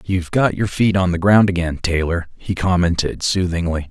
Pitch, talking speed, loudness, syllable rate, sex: 90 Hz, 185 wpm, -18 LUFS, 5.2 syllables/s, male